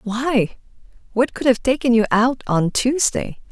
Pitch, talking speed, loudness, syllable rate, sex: 245 Hz, 155 wpm, -19 LUFS, 4.1 syllables/s, female